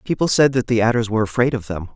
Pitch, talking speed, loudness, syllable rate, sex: 115 Hz, 275 wpm, -18 LUFS, 7.1 syllables/s, male